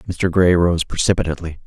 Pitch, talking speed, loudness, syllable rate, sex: 85 Hz, 145 wpm, -18 LUFS, 6.3 syllables/s, male